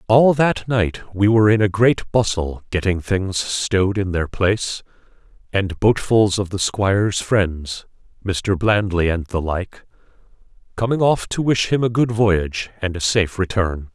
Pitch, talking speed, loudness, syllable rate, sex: 100 Hz, 165 wpm, -19 LUFS, 4.3 syllables/s, male